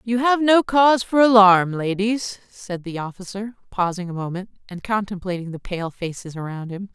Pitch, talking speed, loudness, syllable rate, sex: 200 Hz, 175 wpm, -20 LUFS, 5.0 syllables/s, female